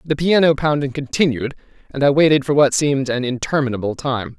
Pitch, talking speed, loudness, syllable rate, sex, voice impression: 135 Hz, 180 wpm, -17 LUFS, 5.9 syllables/s, male, very masculine, slightly young, slightly adult-like, slightly thick, slightly tensed, slightly powerful, bright, very hard, very clear, very fluent, slightly cool, slightly intellectual, slightly refreshing, slightly sincere, calm, mature, friendly, reassuring, slightly unique, wild, slightly sweet, very kind, slightly modest